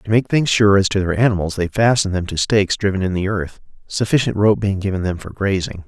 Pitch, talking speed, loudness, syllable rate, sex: 100 Hz, 245 wpm, -18 LUFS, 6.1 syllables/s, male